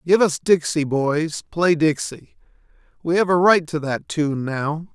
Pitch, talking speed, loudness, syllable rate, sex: 160 Hz, 170 wpm, -20 LUFS, 3.9 syllables/s, male